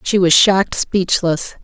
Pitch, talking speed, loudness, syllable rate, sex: 185 Hz, 145 wpm, -14 LUFS, 4.1 syllables/s, female